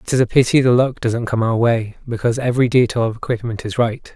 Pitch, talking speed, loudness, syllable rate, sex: 120 Hz, 245 wpm, -17 LUFS, 6.4 syllables/s, male